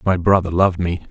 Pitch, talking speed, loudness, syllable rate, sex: 90 Hz, 215 wpm, -17 LUFS, 6.2 syllables/s, male